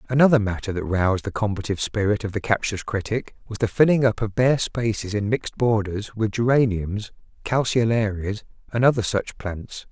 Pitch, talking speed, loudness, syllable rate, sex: 110 Hz, 170 wpm, -22 LUFS, 5.3 syllables/s, male